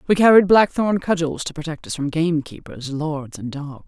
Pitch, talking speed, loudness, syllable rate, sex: 160 Hz, 185 wpm, -19 LUFS, 5.1 syllables/s, female